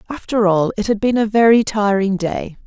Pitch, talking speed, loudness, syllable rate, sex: 210 Hz, 200 wpm, -16 LUFS, 5.1 syllables/s, female